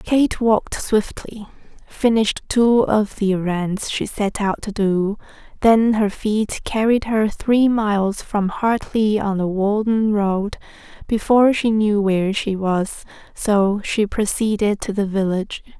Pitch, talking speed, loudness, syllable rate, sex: 210 Hz, 145 wpm, -19 LUFS, 3.9 syllables/s, female